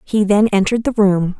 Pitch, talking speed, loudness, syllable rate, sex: 205 Hz, 215 wpm, -15 LUFS, 5.4 syllables/s, female